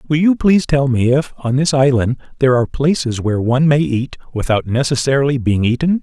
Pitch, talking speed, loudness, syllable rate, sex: 135 Hz, 200 wpm, -15 LUFS, 6.1 syllables/s, male